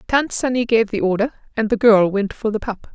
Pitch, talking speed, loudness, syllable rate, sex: 220 Hz, 245 wpm, -18 LUFS, 5.5 syllables/s, female